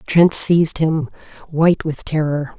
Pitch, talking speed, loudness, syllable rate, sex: 155 Hz, 140 wpm, -17 LUFS, 4.4 syllables/s, female